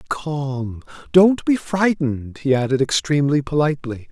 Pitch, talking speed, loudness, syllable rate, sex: 145 Hz, 130 wpm, -19 LUFS, 5.0 syllables/s, male